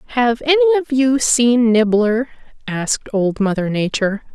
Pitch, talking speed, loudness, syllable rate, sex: 240 Hz, 140 wpm, -16 LUFS, 4.8 syllables/s, female